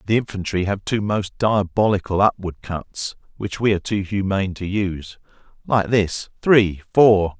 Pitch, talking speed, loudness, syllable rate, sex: 100 Hz, 145 wpm, -20 LUFS, 4.6 syllables/s, male